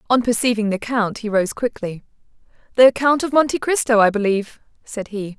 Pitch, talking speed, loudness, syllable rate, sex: 225 Hz, 180 wpm, -18 LUFS, 5.5 syllables/s, female